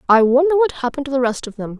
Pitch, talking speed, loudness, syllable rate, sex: 265 Hz, 300 wpm, -17 LUFS, 7.5 syllables/s, female